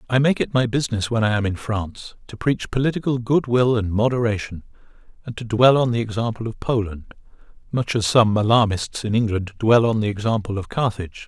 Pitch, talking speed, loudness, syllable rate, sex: 115 Hz, 195 wpm, -20 LUFS, 5.8 syllables/s, male